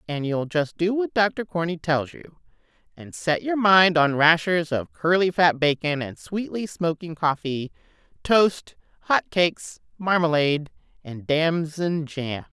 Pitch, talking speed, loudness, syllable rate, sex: 165 Hz, 145 wpm, -22 LUFS, 4.1 syllables/s, female